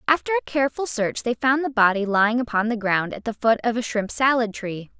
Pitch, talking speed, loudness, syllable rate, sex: 235 Hz, 240 wpm, -22 LUFS, 5.9 syllables/s, female